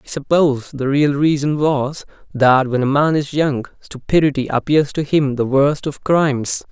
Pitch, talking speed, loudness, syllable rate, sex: 140 Hz, 180 wpm, -17 LUFS, 4.6 syllables/s, male